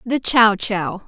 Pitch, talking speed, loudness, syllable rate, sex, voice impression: 220 Hz, 165 wpm, -17 LUFS, 3.1 syllables/s, female, gender-neutral, slightly young, tensed, powerful, bright, clear, slightly halting, slightly cute, friendly, slightly unique, lively, kind